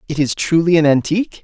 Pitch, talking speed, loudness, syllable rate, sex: 160 Hz, 210 wpm, -15 LUFS, 6.4 syllables/s, male